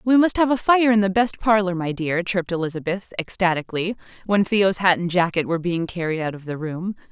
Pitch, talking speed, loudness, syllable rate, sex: 185 Hz, 220 wpm, -21 LUFS, 5.8 syllables/s, female